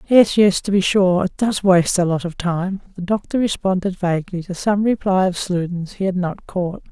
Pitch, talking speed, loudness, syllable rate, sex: 185 Hz, 215 wpm, -19 LUFS, 5.0 syllables/s, female